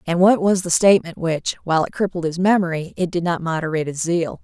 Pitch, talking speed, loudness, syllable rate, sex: 170 Hz, 230 wpm, -19 LUFS, 6.2 syllables/s, female